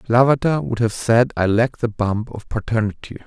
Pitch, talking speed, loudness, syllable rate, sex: 115 Hz, 185 wpm, -19 LUFS, 5.1 syllables/s, male